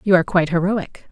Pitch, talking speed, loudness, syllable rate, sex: 180 Hz, 215 wpm, -19 LUFS, 6.9 syllables/s, female